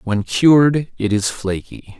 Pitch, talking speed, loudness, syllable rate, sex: 115 Hz, 150 wpm, -16 LUFS, 3.8 syllables/s, male